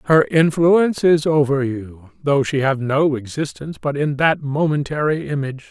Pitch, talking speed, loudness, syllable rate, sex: 145 Hz, 160 wpm, -18 LUFS, 4.8 syllables/s, male